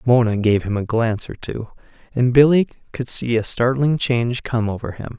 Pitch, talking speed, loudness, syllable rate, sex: 120 Hz, 195 wpm, -19 LUFS, 5.2 syllables/s, male